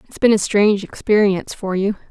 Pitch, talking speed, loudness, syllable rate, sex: 205 Hz, 200 wpm, -17 LUFS, 6.1 syllables/s, female